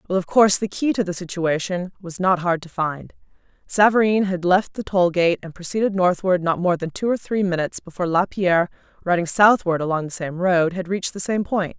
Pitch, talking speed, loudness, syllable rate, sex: 180 Hz, 215 wpm, -20 LUFS, 5.6 syllables/s, female